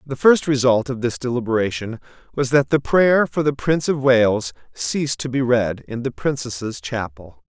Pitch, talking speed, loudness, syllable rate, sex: 125 Hz, 185 wpm, -19 LUFS, 4.7 syllables/s, male